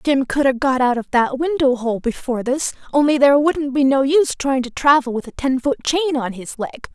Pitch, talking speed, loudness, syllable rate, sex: 270 Hz, 240 wpm, -18 LUFS, 5.4 syllables/s, female